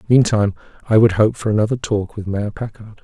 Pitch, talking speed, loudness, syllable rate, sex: 105 Hz, 195 wpm, -18 LUFS, 6.3 syllables/s, male